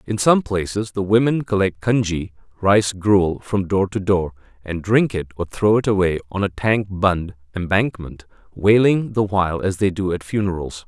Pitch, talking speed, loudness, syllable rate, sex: 95 Hz, 180 wpm, -19 LUFS, 4.8 syllables/s, male